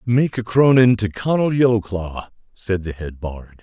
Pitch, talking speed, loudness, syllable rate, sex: 105 Hz, 165 wpm, -18 LUFS, 4.4 syllables/s, male